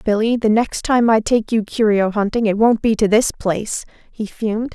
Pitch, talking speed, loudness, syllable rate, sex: 220 Hz, 215 wpm, -17 LUFS, 5.0 syllables/s, female